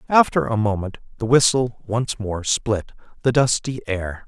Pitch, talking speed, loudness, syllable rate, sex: 110 Hz, 155 wpm, -21 LUFS, 4.3 syllables/s, male